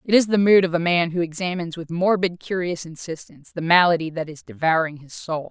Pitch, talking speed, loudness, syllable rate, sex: 170 Hz, 220 wpm, -21 LUFS, 5.9 syllables/s, female